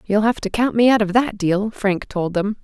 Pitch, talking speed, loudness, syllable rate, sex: 210 Hz, 275 wpm, -19 LUFS, 4.8 syllables/s, female